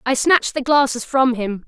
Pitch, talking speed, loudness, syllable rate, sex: 255 Hz, 215 wpm, -17 LUFS, 5.2 syllables/s, female